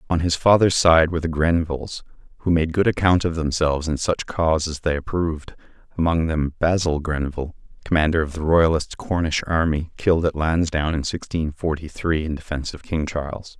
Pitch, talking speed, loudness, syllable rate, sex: 80 Hz, 180 wpm, -21 LUFS, 5.5 syllables/s, male